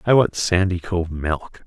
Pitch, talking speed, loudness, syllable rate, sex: 90 Hz, 145 wpm, -21 LUFS, 4.5 syllables/s, male